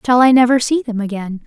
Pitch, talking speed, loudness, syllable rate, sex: 240 Hz, 245 wpm, -14 LUFS, 6.1 syllables/s, female